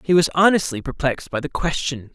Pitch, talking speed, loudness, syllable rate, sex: 150 Hz, 195 wpm, -20 LUFS, 6.0 syllables/s, male